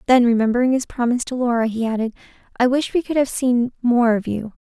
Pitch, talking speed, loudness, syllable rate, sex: 240 Hz, 220 wpm, -19 LUFS, 6.3 syllables/s, female